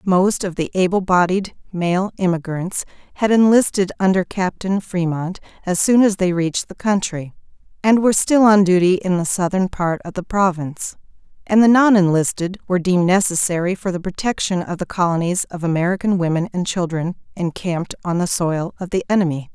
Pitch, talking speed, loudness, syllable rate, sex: 185 Hz, 170 wpm, -18 LUFS, 5.4 syllables/s, female